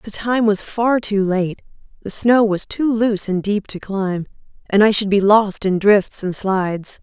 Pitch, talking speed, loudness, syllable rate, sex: 205 Hz, 205 wpm, -17 LUFS, 4.3 syllables/s, female